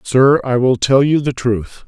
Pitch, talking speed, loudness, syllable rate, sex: 125 Hz, 225 wpm, -14 LUFS, 4.0 syllables/s, male